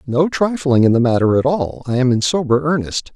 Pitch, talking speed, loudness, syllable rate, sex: 135 Hz, 230 wpm, -16 LUFS, 5.3 syllables/s, male